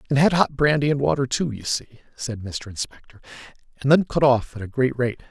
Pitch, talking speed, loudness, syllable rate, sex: 130 Hz, 225 wpm, -22 LUFS, 5.8 syllables/s, male